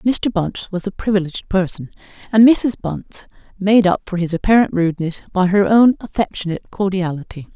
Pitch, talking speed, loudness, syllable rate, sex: 195 Hz, 160 wpm, -17 LUFS, 5.8 syllables/s, female